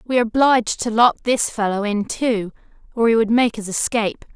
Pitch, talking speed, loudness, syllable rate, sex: 225 Hz, 205 wpm, -19 LUFS, 5.5 syllables/s, female